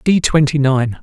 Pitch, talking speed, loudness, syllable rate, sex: 140 Hz, 175 wpm, -14 LUFS, 4.3 syllables/s, male